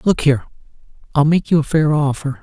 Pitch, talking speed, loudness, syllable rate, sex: 150 Hz, 175 wpm, -16 LUFS, 6.0 syllables/s, male